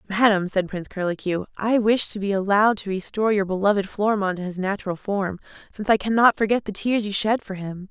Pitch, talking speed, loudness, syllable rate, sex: 200 Hz, 210 wpm, -22 LUFS, 6.2 syllables/s, female